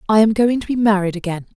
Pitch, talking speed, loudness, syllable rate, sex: 210 Hz, 265 wpm, -17 LUFS, 6.8 syllables/s, female